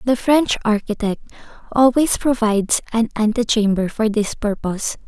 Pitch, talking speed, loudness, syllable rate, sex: 225 Hz, 120 wpm, -18 LUFS, 4.8 syllables/s, female